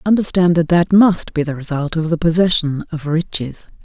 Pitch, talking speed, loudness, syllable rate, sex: 165 Hz, 190 wpm, -16 LUFS, 5.1 syllables/s, female